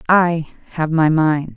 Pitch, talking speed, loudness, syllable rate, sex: 160 Hz, 155 wpm, -17 LUFS, 3.7 syllables/s, female